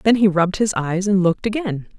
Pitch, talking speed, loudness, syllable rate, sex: 195 Hz, 240 wpm, -19 LUFS, 6.1 syllables/s, female